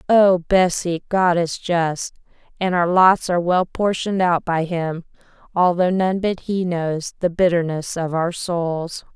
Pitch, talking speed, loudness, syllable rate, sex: 175 Hz, 155 wpm, -19 LUFS, 4.0 syllables/s, female